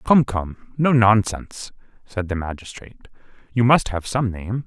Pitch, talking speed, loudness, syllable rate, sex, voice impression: 110 Hz, 155 wpm, -20 LUFS, 4.5 syllables/s, male, masculine, adult-like, tensed, powerful, bright, clear, fluent, intellectual, calm, friendly, reassuring, lively, kind